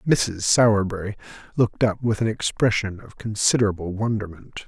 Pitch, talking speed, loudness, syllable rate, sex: 105 Hz, 130 wpm, -22 LUFS, 5.4 syllables/s, male